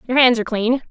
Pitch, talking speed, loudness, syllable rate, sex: 240 Hz, 265 wpm, -17 LUFS, 7.3 syllables/s, female